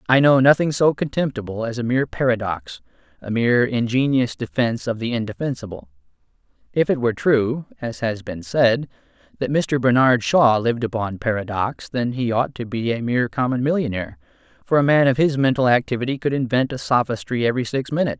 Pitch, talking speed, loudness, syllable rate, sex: 125 Hz, 180 wpm, -20 LUFS, 5.8 syllables/s, male